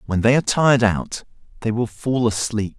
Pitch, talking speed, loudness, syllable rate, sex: 115 Hz, 195 wpm, -19 LUFS, 5.4 syllables/s, male